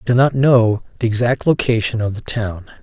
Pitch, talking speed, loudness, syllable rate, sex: 115 Hz, 210 wpm, -17 LUFS, 5.4 syllables/s, male